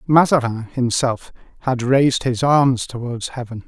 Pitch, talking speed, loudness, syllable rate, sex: 125 Hz, 130 wpm, -18 LUFS, 4.5 syllables/s, male